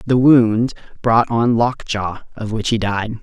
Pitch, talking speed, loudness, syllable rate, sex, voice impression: 115 Hz, 170 wpm, -17 LUFS, 3.8 syllables/s, male, very masculine, slightly young, slightly thick, tensed, powerful, very bright, soft, very clear, fluent, very cool, intellectual, very refreshing, sincere, calm, very friendly, very reassuring, unique, elegant, very sweet, very lively, kind, slightly modest, slightly light